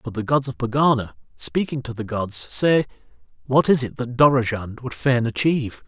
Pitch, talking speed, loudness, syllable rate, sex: 125 Hz, 185 wpm, -21 LUFS, 5.1 syllables/s, male